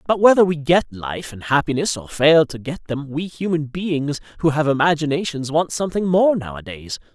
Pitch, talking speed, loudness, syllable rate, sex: 150 Hz, 185 wpm, -19 LUFS, 5.1 syllables/s, male